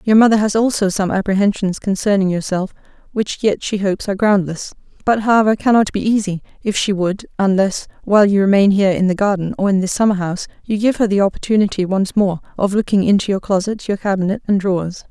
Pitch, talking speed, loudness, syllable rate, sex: 200 Hz, 205 wpm, -16 LUFS, 5.1 syllables/s, female